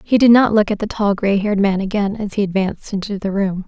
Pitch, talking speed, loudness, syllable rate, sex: 200 Hz, 275 wpm, -17 LUFS, 6.2 syllables/s, female